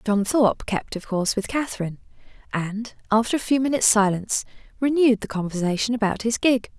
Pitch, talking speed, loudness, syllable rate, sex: 225 Hz, 170 wpm, -22 LUFS, 6.3 syllables/s, female